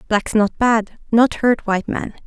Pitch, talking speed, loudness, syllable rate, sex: 220 Hz, 185 wpm, -18 LUFS, 4.5 syllables/s, female